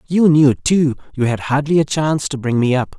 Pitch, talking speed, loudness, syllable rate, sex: 140 Hz, 240 wpm, -16 LUFS, 5.3 syllables/s, male